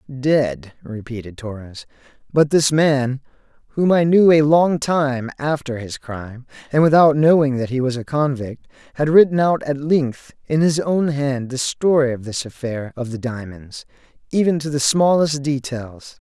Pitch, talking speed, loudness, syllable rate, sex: 140 Hz, 165 wpm, -18 LUFS, 4.4 syllables/s, male